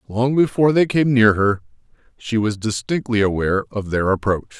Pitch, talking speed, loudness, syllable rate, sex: 115 Hz, 170 wpm, -19 LUFS, 5.2 syllables/s, male